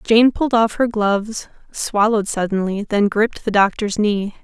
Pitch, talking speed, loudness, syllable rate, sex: 210 Hz, 160 wpm, -18 LUFS, 5.0 syllables/s, female